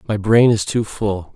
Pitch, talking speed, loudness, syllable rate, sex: 105 Hz, 220 wpm, -17 LUFS, 4.3 syllables/s, male